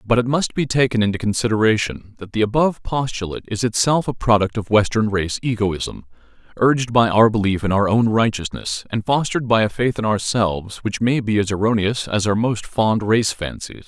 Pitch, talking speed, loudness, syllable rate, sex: 110 Hz, 195 wpm, -19 LUFS, 5.6 syllables/s, male